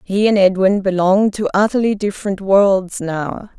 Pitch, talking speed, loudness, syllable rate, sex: 195 Hz, 150 wpm, -16 LUFS, 4.8 syllables/s, female